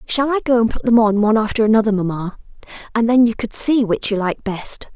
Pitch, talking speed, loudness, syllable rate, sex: 220 Hz, 240 wpm, -17 LUFS, 6.3 syllables/s, female